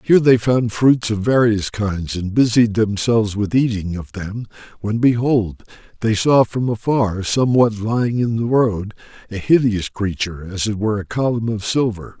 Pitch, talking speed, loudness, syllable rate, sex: 110 Hz, 170 wpm, -18 LUFS, 4.7 syllables/s, male